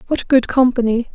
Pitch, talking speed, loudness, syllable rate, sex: 245 Hz, 155 wpm, -16 LUFS, 5.3 syllables/s, female